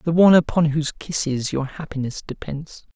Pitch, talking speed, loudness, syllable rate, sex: 150 Hz, 165 wpm, -21 LUFS, 5.3 syllables/s, male